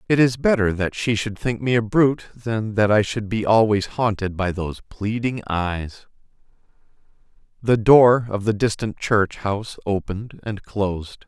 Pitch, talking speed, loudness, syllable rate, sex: 110 Hz, 165 wpm, -21 LUFS, 4.6 syllables/s, male